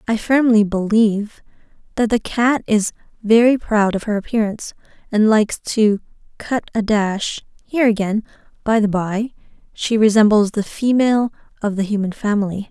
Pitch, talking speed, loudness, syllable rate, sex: 215 Hz, 140 wpm, -18 LUFS, 5.0 syllables/s, female